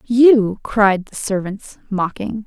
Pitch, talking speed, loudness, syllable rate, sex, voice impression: 210 Hz, 120 wpm, -17 LUFS, 3.1 syllables/s, female, very feminine, slightly young, very adult-like, very thin, very relaxed, weak, slightly dark, very soft, slightly muffled, fluent, slightly raspy, very cute, intellectual, very refreshing, sincere, very calm, very friendly, very reassuring, very unique, very elegant, very sweet, very kind, very modest, light